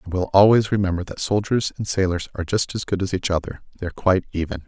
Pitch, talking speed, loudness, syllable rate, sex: 95 Hz, 220 wpm, -21 LUFS, 6.8 syllables/s, male